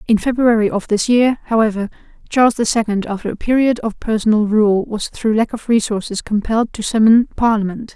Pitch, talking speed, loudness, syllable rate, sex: 220 Hz, 180 wpm, -16 LUFS, 5.7 syllables/s, female